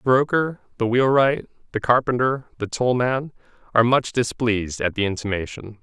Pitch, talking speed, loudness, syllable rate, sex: 120 Hz, 155 wpm, -21 LUFS, 5.3 syllables/s, male